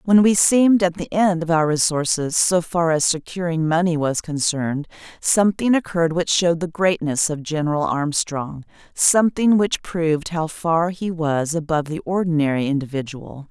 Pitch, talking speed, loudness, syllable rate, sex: 165 Hz, 155 wpm, -19 LUFS, 5.0 syllables/s, female